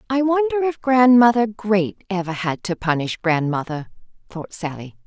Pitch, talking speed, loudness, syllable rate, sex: 205 Hz, 140 wpm, -19 LUFS, 4.6 syllables/s, female